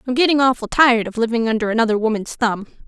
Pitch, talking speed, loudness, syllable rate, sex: 235 Hz, 210 wpm, -17 LUFS, 7.0 syllables/s, female